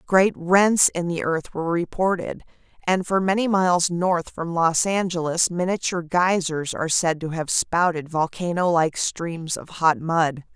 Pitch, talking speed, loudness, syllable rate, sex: 170 Hz, 160 wpm, -22 LUFS, 4.4 syllables/s, female